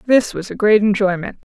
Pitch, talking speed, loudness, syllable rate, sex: 205 Hz, 195 wpm, -17 LUFS, 5.3 syllables/s, female